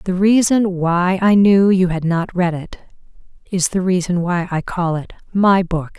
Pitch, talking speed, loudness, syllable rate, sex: 180 Hz, 190 wpm, -16 LUFS, 4.1 syllables/s, female